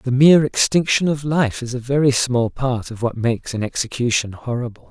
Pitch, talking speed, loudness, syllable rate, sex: 125 Hz, 195 wpm, -19 LUFS, 5.3 syllables/s, male